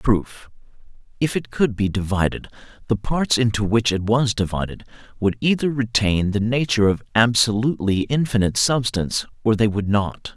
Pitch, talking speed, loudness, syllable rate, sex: 110 Hz, 145 wpm, -20 LUFS, 5.3 syllables/s, male